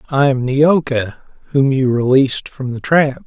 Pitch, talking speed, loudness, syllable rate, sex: 135 Hz, 165 wpm, -15 LUFS, 4.5 syllables/s, male